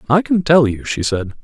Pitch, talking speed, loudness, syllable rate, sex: 140 Hz, 250 wpm, -16 LUFS, 5.2 syllables/s, male